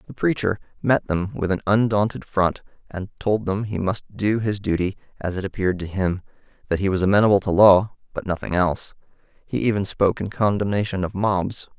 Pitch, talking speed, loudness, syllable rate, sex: 100 Hz, 190 wpm, -22 LUFS, 5.5 syllables/s, male